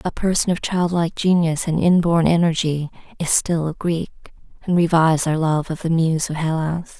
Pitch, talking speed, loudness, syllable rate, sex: 165 Hz, 180 wpm, -19 LUFS, 5.0 syllables/s, female